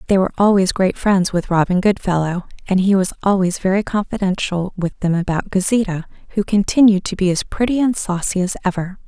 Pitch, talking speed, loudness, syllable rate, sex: 190 Hz, 185 wpm, -18 LUFS, 5.7 syllables/s, female